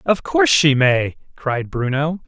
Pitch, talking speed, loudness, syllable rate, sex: 130 Hz, 160 wpm, -17 LUFS, 4.1 syllables/s, male